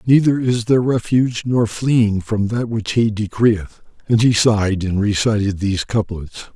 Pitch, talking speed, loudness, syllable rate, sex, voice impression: 110 Hz, 165 wpm, -17 LUFS, 4.8 syllables/s, male, very masculine, slightly old, slightly relaxed, slightly weak, slightly muffled, calm, mature, reassuring, kind, slightly modest